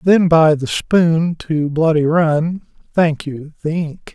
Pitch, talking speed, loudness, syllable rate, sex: 160 Hz, 145 wpm, -16 LUFS, 3.3 syllables/s, male